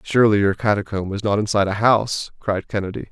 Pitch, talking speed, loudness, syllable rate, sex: 105 Hz, 190 wpm, -20 LUFS, 6.5 syllables/s, male